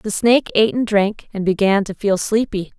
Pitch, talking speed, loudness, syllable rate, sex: 205 Hz, 215 wpm, -18 LUFS, 5.3 syllables/s, female